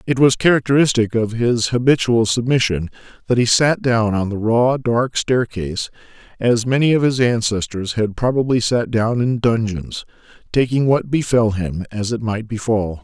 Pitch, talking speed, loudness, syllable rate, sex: 115 Hz, 160 wpm, -18 LUFS, 4.7 syllables/s, male